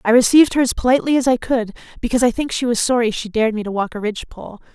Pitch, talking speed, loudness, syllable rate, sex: 235 Hz, 265 wpm, -17 LUFS, 7.8 syllables/s, female